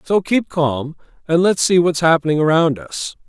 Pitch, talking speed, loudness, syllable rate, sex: 165 Hz, 185 wpm, -17 LUFS, 4.7 syllables/s, male